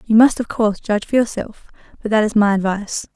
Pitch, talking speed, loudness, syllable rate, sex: 215 Hz, 210 wpm, -18 LUFS, 6.4 syllables/s, female